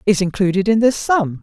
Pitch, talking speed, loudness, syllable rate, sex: 200 Hz, 210 wpm, -16 LUFS, 5.3 syllables/s, female